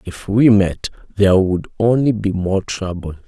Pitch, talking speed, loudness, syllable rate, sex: 100 Hz, 165 wpm, -16 LUFS, 4.5 syllables/s, male